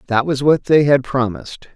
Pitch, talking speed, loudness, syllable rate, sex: 135 Hz, 205 wpm, -16 LUFS, 5.3 syllables/s, male